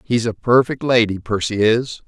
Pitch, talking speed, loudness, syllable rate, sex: 115 Hz, 175 wpm, -17 LUFS, 4.6 syllables/s, male